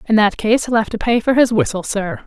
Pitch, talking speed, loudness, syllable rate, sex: 220 Hz, 290 wpm, -16 LUFS, 5.6 syllables/s, female